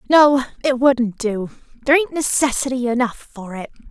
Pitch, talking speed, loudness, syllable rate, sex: 250 Hz, 155 wpm, -18 LUFS, 5.1 syllables/s, female